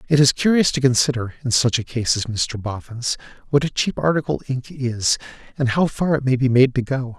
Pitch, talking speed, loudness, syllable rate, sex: 130 Hz, 225 wpm, -20 LUFS, 5.4 syllables/s, male